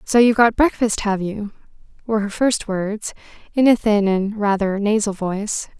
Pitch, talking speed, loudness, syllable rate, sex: 210 Hz, 175 wpm, -19 LUFS, 4.9 syllables/s, female